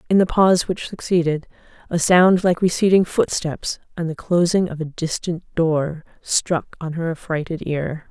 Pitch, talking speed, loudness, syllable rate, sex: 170 Hz, 165 wpm, -20 LUFS, 4.5 syllables/s, female